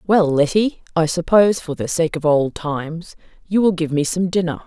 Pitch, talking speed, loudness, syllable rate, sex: 170 Hz, 205 wpm, -18 LUFS, 5.2 syllables/s, female